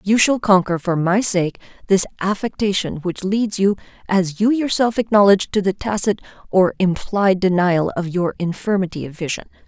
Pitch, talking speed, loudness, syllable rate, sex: 190 Hz, 160 wpm, -18 LUFS, 5.0 syllables/s, female